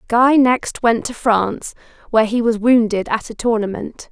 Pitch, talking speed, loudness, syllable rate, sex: 230 Hz, 175 wpm, -17 LUFS, 4.8 syllables/s, female